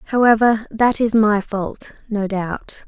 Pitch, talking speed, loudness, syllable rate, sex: 215 Hz, 145 wpm, -18 LUFS, 3.4 syllables/s, female